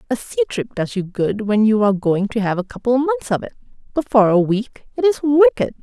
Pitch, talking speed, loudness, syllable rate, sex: 240 Hz, 255 wpm, -18 LUFS, 5.7 syllables/s, female